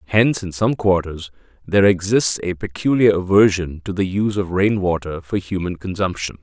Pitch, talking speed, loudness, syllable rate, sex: 95 Hz, 170 wpm, -19 LUFS, 5.3 syllables/s, male